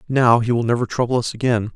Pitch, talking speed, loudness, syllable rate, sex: 120 Hz, 240 wpm, -19 LUFS, 6.4 syllables/s, male